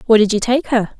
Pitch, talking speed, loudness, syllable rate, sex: 230 Hz, 300 wpm, -15 LUFS, 6.0 syllables/s, female